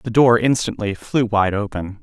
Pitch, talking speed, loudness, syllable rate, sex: 110 Hz, 180 wpm, -18 LUFS, 4.5 syllables/s, male